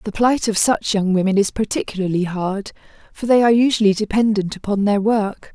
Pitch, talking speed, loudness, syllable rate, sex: 210 Hz, 185 wpm, -18 LUFS, 5.6 syllables/s, female